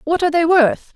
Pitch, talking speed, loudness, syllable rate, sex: 325 Hz, 250 wpm, -15 LUFS, 6.0 syllables/s, female